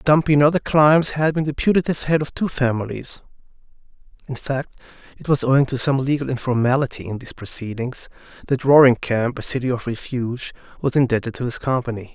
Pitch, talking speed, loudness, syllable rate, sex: 135 Hz, 170 wpm, -20 LUFS, 6.1 syllables/s, male